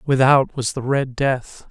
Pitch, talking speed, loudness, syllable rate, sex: 130 Hz, 175 wpm, -19 LUFS, 3.9 syllables/s, male